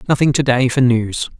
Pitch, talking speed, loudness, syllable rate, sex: 130 Hz, 215 wpm, -15 LUFS, 5.3 syllables/s, male